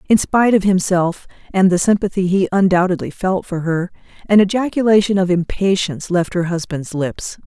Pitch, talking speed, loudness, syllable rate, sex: 185 Hz, 160 wpm, -17 LUFS, 5.3 syllables/s, female